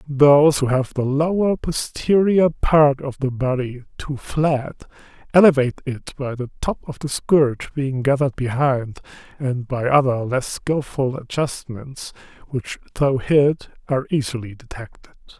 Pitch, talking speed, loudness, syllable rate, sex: 140 Hz, 135 wpm, -20 LUFS, 4.2 syllables/s, male